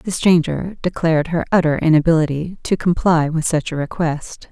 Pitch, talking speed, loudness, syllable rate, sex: 165 Hz, 160 wpm, -18 LUFS, 5.1 syllables/s, female